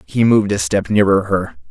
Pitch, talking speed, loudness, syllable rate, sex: 100 Hz, 210 wpm, -15 LUFS, 5.3 syllables/s, male